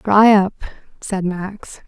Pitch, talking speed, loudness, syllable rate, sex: 195 Hz, 130 wpm, -16 LUFS, 3.0 syllables/s, female